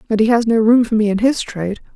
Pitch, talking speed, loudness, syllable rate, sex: 225 Hz, 305 wpm, -15 LUFS, 6.8 syllables/s, female